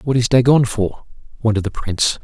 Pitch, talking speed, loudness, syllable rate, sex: 115 Hz, 190 wpm, -17 LUFS, 5.9 syllables/s, male